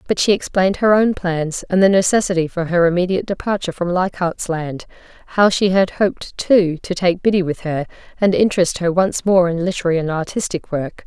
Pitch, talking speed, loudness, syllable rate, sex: 180 Hz, 190 wpm, -17 LUFS, 5.7 syllables/s, female